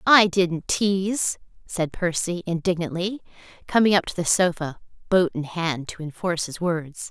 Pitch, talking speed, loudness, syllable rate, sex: 175 Hz, 150 wpm, -23 LUFS, 4.6 syllables/s, female